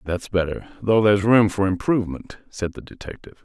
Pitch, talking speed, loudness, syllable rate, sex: 100 Hz, 175 wpm, -21 LUFS, 5.9 syllables/s, male